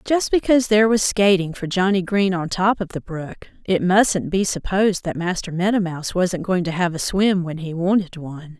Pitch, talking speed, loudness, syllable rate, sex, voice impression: 185 Hz, 215 wpm, -20 LUFS, 5.2 syllables/s, female, feminine, very adult-like, calm, elegant